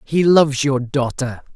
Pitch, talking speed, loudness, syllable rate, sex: 135 Hz, 155 wpm, -17 LUFS, 4.4 syllables/s, male